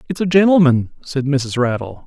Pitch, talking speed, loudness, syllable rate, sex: 145 Hz, 175 wpm, -16 LUFS, 5.0 syllables/s, male